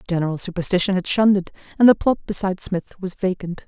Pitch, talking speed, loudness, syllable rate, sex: 190 Hz, 195 wpm, -20 LUFS, 6.9 syllables/s, female